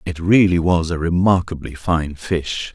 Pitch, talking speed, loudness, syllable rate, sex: 85 Hz, 155 wpm, -18 LUFS, 4.2 syllables/s, male